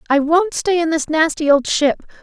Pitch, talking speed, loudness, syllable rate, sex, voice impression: 315 Hz, 215 wpm, -16 LUFS, 4.9 syllables/s, female, feminine, adult-like, tensed, bright, slightly soft, clear, fluent, intellectual, friendly, reassuring, elegant, lively, slightly kind, slightly sharp